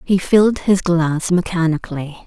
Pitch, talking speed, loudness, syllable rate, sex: 175 Hz, 135 wpm, -17 LUFS, 4.6 syllables/s, female